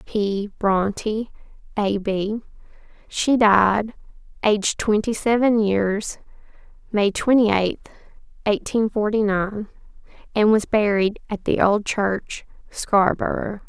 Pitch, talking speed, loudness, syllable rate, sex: 210 Hz, 105 wpm, -21 LUFS, 3.6 syllables/s, female